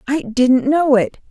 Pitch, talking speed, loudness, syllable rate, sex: 255 Hz, 185 wpm, -15 LUFS, 3.8 syllables/s, female